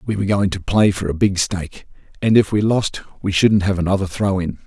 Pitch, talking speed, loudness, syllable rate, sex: 95 Hz, 245 wpm, -18 LUFS, 5.9 syllables/s, male